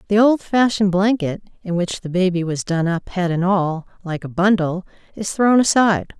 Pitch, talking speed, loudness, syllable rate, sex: 190 Hz, 185 wpm, -19 LUFS, 5.1 syllables/s, female